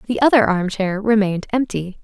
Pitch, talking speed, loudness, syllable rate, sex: 210 Hz, 175 wpm, -18 LUFS, 5.6 syllables/s, female